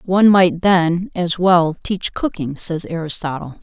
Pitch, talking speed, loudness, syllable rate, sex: 175 Hz, 150 wpm, -17 LUFS, 3.9 syllables/s, female